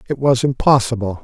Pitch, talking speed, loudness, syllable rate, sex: 125 Hz, 145 wpm, -16 LUFS, 5.7 syllables/s, male